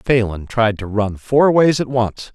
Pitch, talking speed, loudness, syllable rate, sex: 115 Hz, 205 wpm, -17 LUFS, 4.0 syllables/s, male